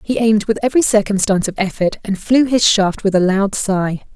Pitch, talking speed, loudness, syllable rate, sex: 205 Hz, 215 wpm, -15 LUFS, 5.7 syllables/s, female